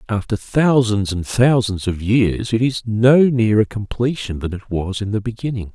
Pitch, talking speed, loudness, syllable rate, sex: 110 Hz, 175 wpm, -18 LUFS, 4.5 syllables/s, male